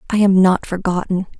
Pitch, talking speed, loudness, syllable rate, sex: 190 Hz, 170 wpm, -16 LUFS, 5.4 syllables/s, female